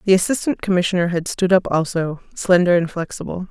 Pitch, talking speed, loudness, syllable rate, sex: 180 Hz, 170 wpm, -19 LUFS, 5.9 syllables/s, female